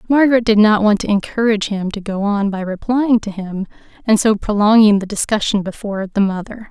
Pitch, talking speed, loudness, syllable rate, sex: 210 Hz, 195 wpm, -16 LUFS, 5.7 syllables/s, female